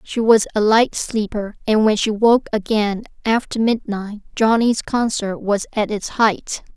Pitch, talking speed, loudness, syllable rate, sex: 215 Hz, 160 wpm, -18 LUFS, 4.1 syllables/s, female